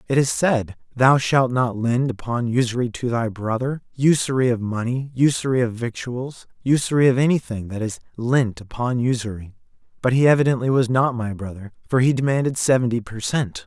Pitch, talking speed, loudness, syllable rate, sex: 120 Hz, 170 wpm, -21 LUFS, 5.2 syllables/s, male